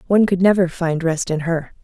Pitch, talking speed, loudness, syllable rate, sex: 175 Hz, 230 wpm, -18 LUFS, 5.7 syllables/s, female